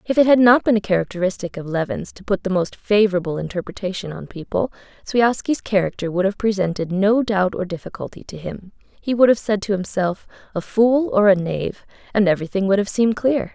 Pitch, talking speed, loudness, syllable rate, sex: 200 Hz, 200 wpm, -20 LUFS, 5.9 syllables/s, female